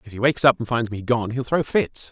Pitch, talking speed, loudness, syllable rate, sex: 120 Hz, 315 wpm, -21 LUFS, 6.1 syllables/s, male